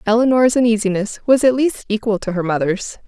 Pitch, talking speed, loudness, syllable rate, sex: 220 Hz, 175 wpm, -17 LUFS, 5.8 syllables/s, female